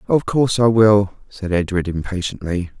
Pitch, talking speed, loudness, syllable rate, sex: 100 Hz, 150 wpm, -18 LUFS, 5.0 syllables/s, male